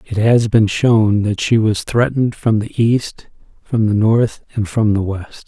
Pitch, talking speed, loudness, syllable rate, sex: 110 Hz, 195 wpm, -16 LUFS, 4.1 syllables/s, male